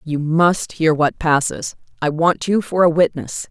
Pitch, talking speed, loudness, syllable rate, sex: 160 Hz, 190 wpm, -17 LUFS, 4.1 syllables/s, female